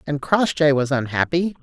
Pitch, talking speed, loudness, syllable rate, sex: 150 Hz, 150 wpm, -19 LUFS, 4.9 syllables/s, female